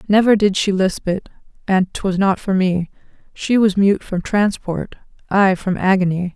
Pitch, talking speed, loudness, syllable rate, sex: 190 Hz, 180 wpm, -17 LUFS, 4.6 syllables/s, female